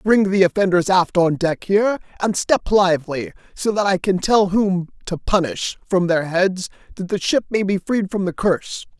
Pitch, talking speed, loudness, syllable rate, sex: 190 Hz, 200 wpm, -19 LUFS, 4.8 syllables/s, male